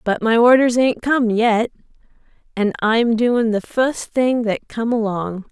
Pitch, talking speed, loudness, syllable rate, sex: 230 Hz, 175 wpm, -17 LUFS, 4.0 syllables/s, female